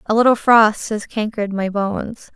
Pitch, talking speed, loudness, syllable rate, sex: 215 Hz, 180 wpm, -17 LUFS, 5.0 syllables/s, female